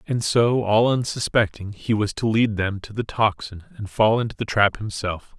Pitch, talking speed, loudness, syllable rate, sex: 105 Hz, 200 wpm, -21 LUFS, 4.9 syllables/s, male